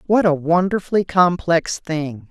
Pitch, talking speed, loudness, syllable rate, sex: 170 Hz, 130 wpm, -18 LUFS, 4.2 syllables/s, female